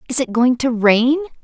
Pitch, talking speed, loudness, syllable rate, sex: 250 Hz, 210 wpm, -16 LUFS, 5.1 syllables/s, female